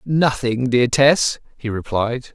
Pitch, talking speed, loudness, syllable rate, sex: 125 Hz, 130 wpm, -18 LUFS, 3.4 syllables/s, male